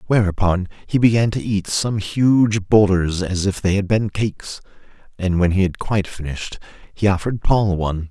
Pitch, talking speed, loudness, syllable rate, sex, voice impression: 100 Hz, 180 wpm, -19 LUFS, 5.0 syllables/s, male, masculine, very adult-like, slightly thick, cool, slightly sincere, slightly calm